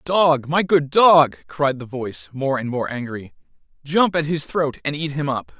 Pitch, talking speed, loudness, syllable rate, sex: 145 Hz, 205 wpm, -20 LUFS, 4.4 syllables/s, male